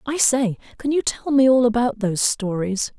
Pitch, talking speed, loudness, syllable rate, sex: 240 Hz, 200 wpm, -20 LUFS, 4.9 syllables/s, female